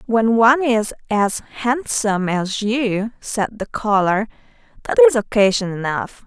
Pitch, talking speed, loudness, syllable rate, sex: 220 Hz, 135 wpm, -18 LUFS, 4.0 syllables/s, female